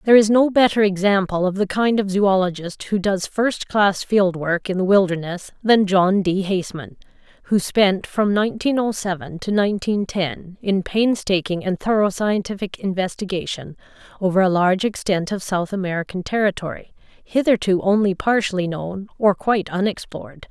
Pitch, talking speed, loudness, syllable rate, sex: 195 Hz, 155 wpm, -20 LUFS, 5.0 syllables/s, female